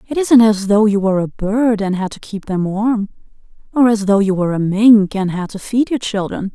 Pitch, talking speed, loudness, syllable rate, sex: 210 Hz, 245 wpm, -15 LUFS, 5.2 syllables/s, female